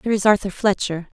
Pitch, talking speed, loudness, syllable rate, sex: 200 Hz, 200 wpm, -20 LUFS, 6.9 syllables/s, female